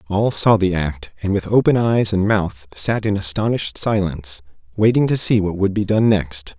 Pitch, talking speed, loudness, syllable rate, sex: 100 Hz, 200 wpm, -18 LUFS, 4.9 syllables/s, male